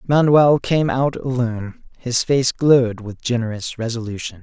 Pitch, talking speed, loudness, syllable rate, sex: 125 Hz, 135 wpm, -18 LUFS, 4.6 syllables/s, male